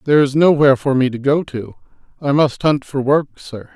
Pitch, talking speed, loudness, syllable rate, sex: 140 Hz, 225 wpm, -16 LUFS, 5.4 syllables/s, male